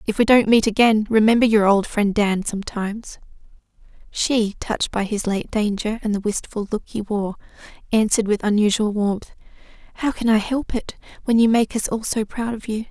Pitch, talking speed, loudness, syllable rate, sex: 215 Hz, 190 wpm, -20 LUFS, 5.3 syllables/s, female